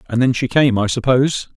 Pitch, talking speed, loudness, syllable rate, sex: 125 Hz, 225 wpm, -16 LUFS, 6.0 syllables/s, male